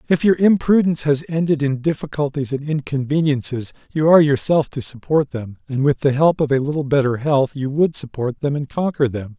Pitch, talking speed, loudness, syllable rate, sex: 145 Hz, 200 wpm, -19 LUFS, 5.5 syllables/s, male